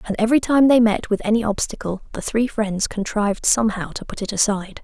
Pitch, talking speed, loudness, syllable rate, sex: 215 Hz, 210 wpm, -20 LUFS, 6.2 syllables/s, female